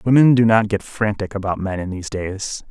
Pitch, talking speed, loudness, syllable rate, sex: 105 Hz, 220 wpm, -19 LUFS, 5.4 syllables/s, male